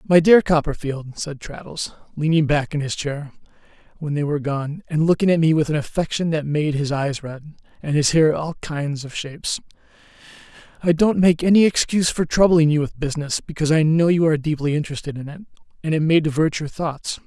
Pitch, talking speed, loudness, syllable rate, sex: 155 Hz, 200 wpm, -20 LUFS, 5.8 syllables/s, male